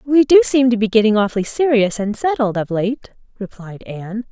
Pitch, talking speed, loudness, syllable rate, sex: 225 Hz, 195 wpm, -16 LUFS, 5.4 syllables/s, female